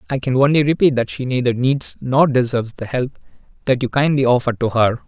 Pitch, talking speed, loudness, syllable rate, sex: 130 Hz, 215 wpm, -17 LUFS, 5.8 syllables/s, male